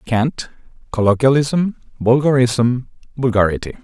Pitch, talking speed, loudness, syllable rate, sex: 125 Hz, 65 wpm, -17 LUFS, 4.4 syllables/s, male